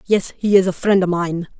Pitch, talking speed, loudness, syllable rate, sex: 185 Hz, 265 wpm, -17 LUFS, 6.0 syllables/s, female